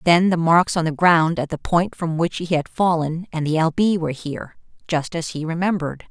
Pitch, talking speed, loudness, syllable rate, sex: 165 Hz, 235 wpm, -20 LUFS, 5.4 syllables/s, female